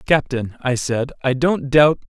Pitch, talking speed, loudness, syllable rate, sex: 135 Hz, 170 wpm, -19 LUFS, 4.1 syllables/s, male